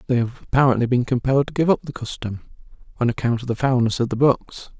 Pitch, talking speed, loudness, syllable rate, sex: 125 Hz, 225 wpm, -21 LUFS, 6.5 syllables/s, male